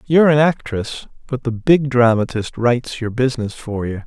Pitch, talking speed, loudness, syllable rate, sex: 125 Hz, 175 wpm, -18 LUFS, 5.1 syllables/s, male